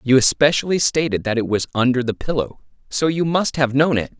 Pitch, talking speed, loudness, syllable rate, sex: 135 Hz, 215 wpm, -19 LUFS, 5.7 syllables/s, male